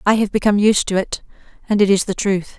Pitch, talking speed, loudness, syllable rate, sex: 200 Hz, 230 wpm, -17 LUFS, 6.5 syllables/s, female